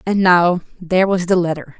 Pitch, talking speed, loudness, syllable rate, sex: 175 Hz, 165 wpm, -16 LUFS, 5.4 syllables/s, female